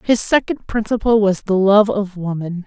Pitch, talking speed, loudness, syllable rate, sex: 205 Hz, 180 wpm, -17 LUFS, 4.7 syllables/s, female